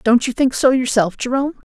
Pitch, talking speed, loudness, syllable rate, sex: 250 Hz, 205 wpm, -17 LUFS, 6.1 syllables/s, female